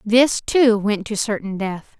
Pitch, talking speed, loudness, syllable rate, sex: 215 Hz, 180 wpm, -19 LUFS, 3.8 syllables/s, female